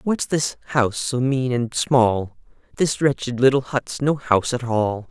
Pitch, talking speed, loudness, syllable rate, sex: 125 Hz, 175 wpm, -21 LUFS, 4.3 syllables/s, male